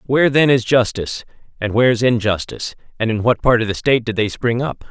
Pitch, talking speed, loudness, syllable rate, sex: 120 Hz, 230 wpm, -17 LUFS, 6.5 syllables/s, male